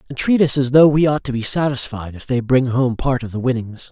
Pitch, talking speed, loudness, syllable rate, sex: 130 Hz, 275 wpm, -17 LUFS, 5.6 syllables/s, male